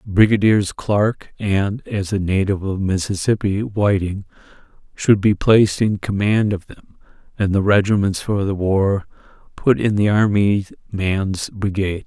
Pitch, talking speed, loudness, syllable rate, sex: 100 Hz, 140 wpm, -18 LUFS, 3.6 syllables/s, male